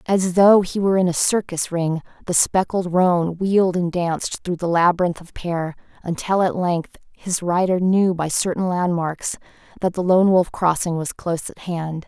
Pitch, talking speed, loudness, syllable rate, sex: 175 Hz, 185 wpm, -20 LUFS, 4.6 syllables/s, female